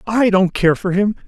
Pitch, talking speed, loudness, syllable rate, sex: 195 Hz, 235 wpm, -16 LUFS, 4.8 syllables/s, male